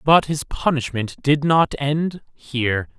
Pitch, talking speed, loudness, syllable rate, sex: 140 Hz, 140 wpm, -20 LUFS, 3.7 syllables/s, male